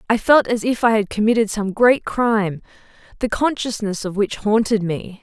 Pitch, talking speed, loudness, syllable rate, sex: 215 Hz, 185 wpm, -18 LUFS, 4.9 syllables/s, female